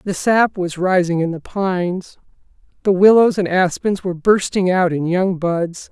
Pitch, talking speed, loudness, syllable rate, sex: 185 Hz, 175 wpm, -17 LUFS, 4.5 syllables/s, female